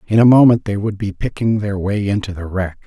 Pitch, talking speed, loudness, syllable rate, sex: 100 Hz, 250 wpm, -16 LUFS, 5.5 syllables/s, male